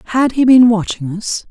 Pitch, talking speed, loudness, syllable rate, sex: 225 Hz, 200 wpm, -13 LUFS, 4.1 syllables/s, female